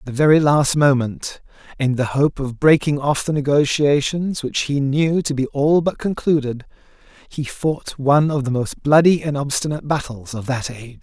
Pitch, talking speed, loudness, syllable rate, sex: 140 Hz, 185 wpm, -18 LUFS, 4.9 syllables/s, male